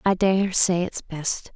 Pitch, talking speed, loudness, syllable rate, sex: 180 Hz, 195 wpm, -22 LUFS, 3.5 syllables/s, female